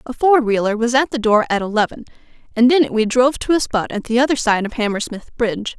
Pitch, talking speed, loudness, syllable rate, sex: 235 Hz, 250 wpm, -17 LUFS, 6.3 syllables/s, female